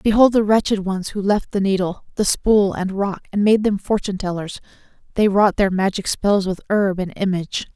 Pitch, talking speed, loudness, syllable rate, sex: 200 Hz, 200 wpm, -19 LUFS, 5.2 syllables/s, female